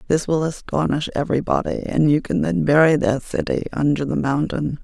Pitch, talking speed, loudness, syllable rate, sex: 150 Hz, 175 wpm, -20 LUFS, 5.4 syllables/s, female